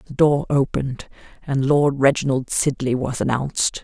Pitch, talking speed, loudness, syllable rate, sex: 135 Hz, 140 wpm, -20 LUFS, 4.9 syllables/s, female